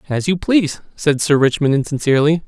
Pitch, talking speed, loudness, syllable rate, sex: 150 Hz, 170 wpm, -16 LUFS, 6.1 syllables/s, male